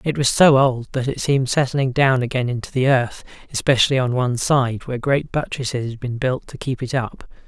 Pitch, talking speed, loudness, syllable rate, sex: 130 Hz, 215 wpm, -19 LUFS, 5.5 syllables/s, male